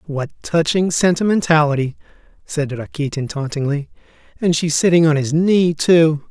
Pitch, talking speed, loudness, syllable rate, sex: 155 Hz, 125 wpm, -17 LUFS, 4.7 syllables/s, male